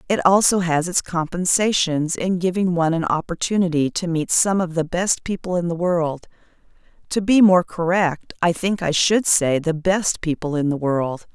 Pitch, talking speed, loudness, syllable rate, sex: 175 Hz, 180 wpm, -20 LUFS, 4.7 syllables/s, female